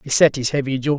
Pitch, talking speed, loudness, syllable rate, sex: 135 Hz, 305 wpm, -18 LUFS, 6.3 syllables/s, male